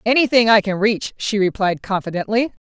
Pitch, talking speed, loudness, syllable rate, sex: 210 Hz, 155 wpm, -18 LUFS, 5.4 syllables/s, female